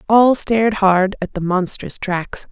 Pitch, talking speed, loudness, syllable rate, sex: 200 Hz, 165 wpm, -17 LUFS, 4.0 syllables/s, female